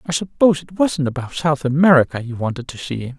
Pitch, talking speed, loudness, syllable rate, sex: 145 Hz, 225 wpm, -18 LUFS, 6.2 syllables/s, male